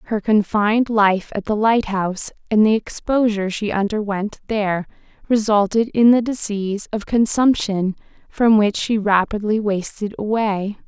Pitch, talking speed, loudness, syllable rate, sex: 210 Hz, 130 wpm, -19 LUFS, 4.7 syllables/s, female